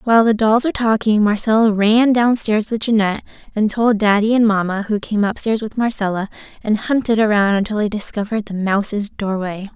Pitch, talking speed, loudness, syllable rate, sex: 215 Hz, 190 wpm, -17 LUFS, 5.6 syllables/s, female